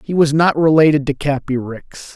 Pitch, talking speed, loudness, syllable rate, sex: 145 Hz, 195 wpm, -15 LUFS, 4.9 syllables/s, male